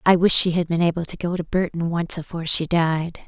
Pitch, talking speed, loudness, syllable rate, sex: 170 Hz, 255 wpm, -21 LUFS, 5.7 syllables/s, female